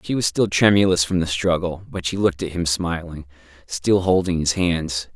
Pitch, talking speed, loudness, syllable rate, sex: 85 Hz, 200 wpm, -20 LUFS, 5.0 syllables/s, male